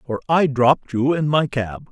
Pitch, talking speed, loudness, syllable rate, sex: 135 Hz, 220 wpm, -19 LUFS, 4.8 syllables/s, male